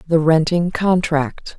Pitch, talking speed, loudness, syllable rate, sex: 165 Hz, 115 wpm, -17 LUFS, 3.7 syllables/s, female